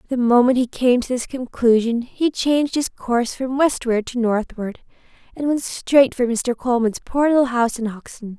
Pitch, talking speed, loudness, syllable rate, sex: 245 Hz, 185 wpm, -19 LUFS, 5.0 syllables/s, female